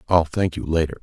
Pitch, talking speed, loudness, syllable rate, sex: 85 Hz, 235 wpm, -22 LUFS, 6.4 syllables/s, male